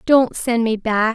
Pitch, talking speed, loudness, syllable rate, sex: 230 Hz, 210 wpm, -18 LUFS, 3.7 syllables/s, female